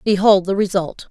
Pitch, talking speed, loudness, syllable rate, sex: 195 Hz, 165 wpm, -17 LUFS, 5.0 syllables/s, female